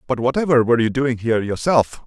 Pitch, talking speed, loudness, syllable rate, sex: 125 Hz, 205 wpm, -18 LUFS, 6.4 syllables/s, male